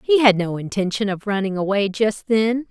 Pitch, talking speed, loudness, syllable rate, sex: 210 Hz, 200 wpm, -20 LUFS, 5.0 syllables/s, female